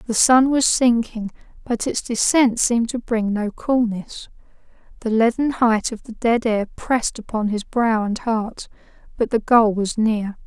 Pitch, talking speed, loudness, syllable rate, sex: 225 Hz, 170 wpm, -20 LUFS, 4.3 syllables/s, female